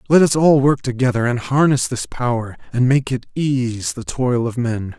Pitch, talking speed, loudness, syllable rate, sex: 125 Hz, 205 wpm, -18 LUFS, 5.0 syllables/s, male